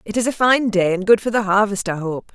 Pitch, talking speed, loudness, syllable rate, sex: 205 Hz, 305 wpm, -18 LUFS, 5.8 syllables/s, female